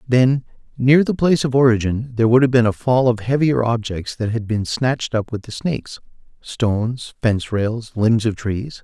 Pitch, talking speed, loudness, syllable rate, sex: 120 Hz, 190 wpm, -18 LUFS, 5.0 syllables/s, male